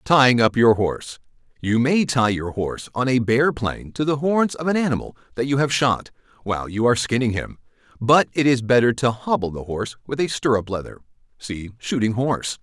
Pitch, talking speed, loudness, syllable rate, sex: 125 Hz, 200 wpm, -21 LUFS, 5.3 syllables/s, male